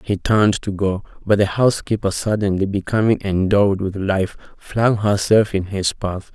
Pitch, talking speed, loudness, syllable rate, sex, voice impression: 100 Hz, 160 wpm, -19 LUFS, 4.8 syllables/s, male, masculine, adult-like, dark, calm, slightly kind